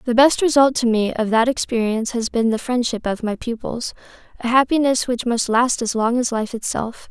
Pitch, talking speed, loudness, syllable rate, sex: 240 Hz, 205 wpm, -19 LUFS, 5.3 syllables/s, female